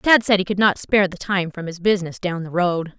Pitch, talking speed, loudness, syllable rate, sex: 185 Hz, 280 wpm, -20 LUFS, 5.8 syllables/s, female